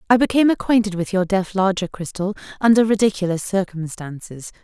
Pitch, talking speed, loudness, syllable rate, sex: 195 Hz, 140 wpm, -19 LUFS, 5.9 syllables/s, female